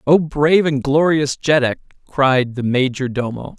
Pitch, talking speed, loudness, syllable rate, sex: 140 Hz, 150 wpm, -17 LUFS, 4.4 syllables/s, male